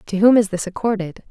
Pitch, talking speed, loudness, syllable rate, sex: 200 Hz, 230 wpm, -18 LUFS, 6.0 syllables/s, female